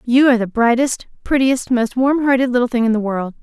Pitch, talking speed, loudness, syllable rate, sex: 245 Hz, 230 wpm, -16 LUFS, 5.8 syllables/s, female